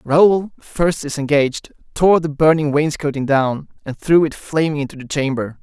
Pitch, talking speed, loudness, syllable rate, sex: 150 Hz, 160 wpm, -17 LUFS, 4.7 syllables/s, male